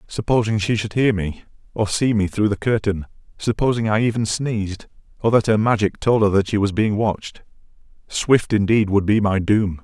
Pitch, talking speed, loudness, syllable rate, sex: 105 Hz, 190 wpm, -19 LUFS, 5.2 syllables/s, male